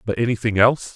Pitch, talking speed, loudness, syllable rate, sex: 110 Hz, 190 wpm, -19 LUFS, 7.1 syllables/s, male